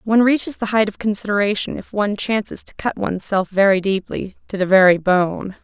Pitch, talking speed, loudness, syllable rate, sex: 200 Hz, 200 wpm, -18 LUFS, 5.8 syllables/s, female